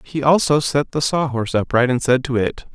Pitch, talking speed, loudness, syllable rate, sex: 135 Hz, 240 wpm, -18 LUFS, 5.4 syllables/s, male